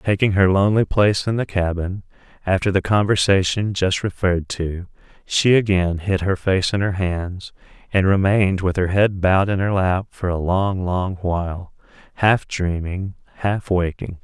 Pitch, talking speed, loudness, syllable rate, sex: 95 Hz, 165 wpm, -20 LUFS, 4.7 syllables/s, male